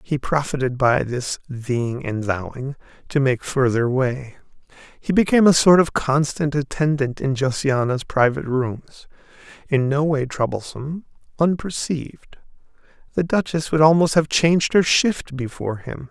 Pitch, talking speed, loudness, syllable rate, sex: 140 Hz, 140 wpm, -20 LUFS, 4.5 syllables/s, male